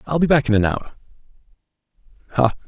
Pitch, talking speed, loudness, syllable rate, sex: 130 Hz, 135 wpm, -19 LUFS, 7.2 syllables/s, male